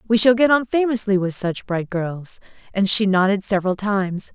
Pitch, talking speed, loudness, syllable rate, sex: 205 Hz, 195 wpm, -19 LUFS, 5.2 syllables/s, female